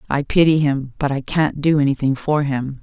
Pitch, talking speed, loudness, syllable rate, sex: 145 Hz, 210 wpm, -18 LUFS, 5.0 syllables/s, female